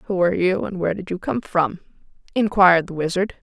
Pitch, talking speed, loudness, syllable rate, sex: 185 Hz, 205 wpm, -20 LUFS, 5.9 syllables/s, female